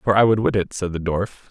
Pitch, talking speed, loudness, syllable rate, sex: 100 Hz, 320 wpm, -20 LUFS, 6.6 syllables/s, male